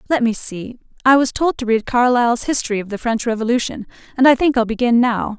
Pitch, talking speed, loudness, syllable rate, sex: 240 Hz, 225 wpm, -17 LUFS, 6.0 syllables/s, female